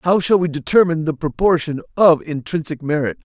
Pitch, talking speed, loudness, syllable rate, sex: 160 Hz, 160 wpm, -18 LUFS, 5.7 syllables/s, male